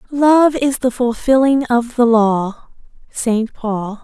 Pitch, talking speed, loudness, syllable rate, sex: 245 Hz, 120 wpm, -15 LUFS, 3.3 syllables/s, female